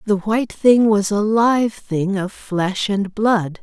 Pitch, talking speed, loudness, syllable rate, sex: 205 Hz, 180 wpm, -18 LUFS, 3.4 syllables/s, female